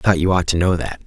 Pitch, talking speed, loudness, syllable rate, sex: 90 Hz, 395 wpm, -18 LUFS, 7.5 syllables/s, male